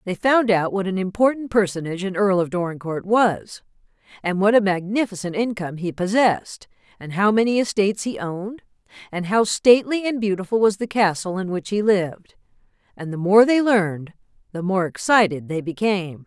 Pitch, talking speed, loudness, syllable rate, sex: 200 Hz, 175 wpm, -20 LUFS, 5.5 syllables/s, female